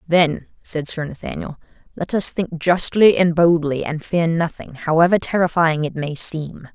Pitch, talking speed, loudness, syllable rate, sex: 165 Hz, 160 wpm, -18 LUFS, 4.5 syllables/s, female